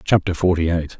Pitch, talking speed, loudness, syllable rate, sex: 85 Hz, 180 wpm, -19 LUFS, 5.6 syllables/s, male